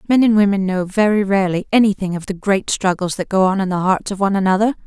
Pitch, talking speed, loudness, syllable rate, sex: 195 Hz, 245 wpm, -17 LUFS, 6.6 syllables/s, female